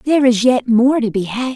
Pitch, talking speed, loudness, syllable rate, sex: 245 Hz, 270 wpm, -15 LUFS, 5.4 syllables/s, female